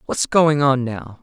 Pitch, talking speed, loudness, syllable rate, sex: 135 Hz, 195 wpm, -18 LUFS, 3.8 syllables/s, male